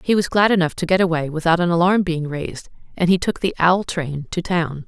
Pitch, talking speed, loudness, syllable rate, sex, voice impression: 170 Hz, 245 wpm, -19 LUFS, 5.7 syllables/s, female, feminine, adult-like, tensed, slightly powerful, hard, clear, fluent, intellectual, elegant, lively, sharp